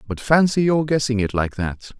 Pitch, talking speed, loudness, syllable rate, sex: 125 Hz, 210 wpm, -20 LUFS, 4.9 syllables/s, male